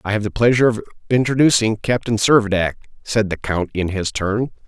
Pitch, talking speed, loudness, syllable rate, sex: 110 Hz, 180 wpm, -18 LUFS, 5.7 syllables/s, male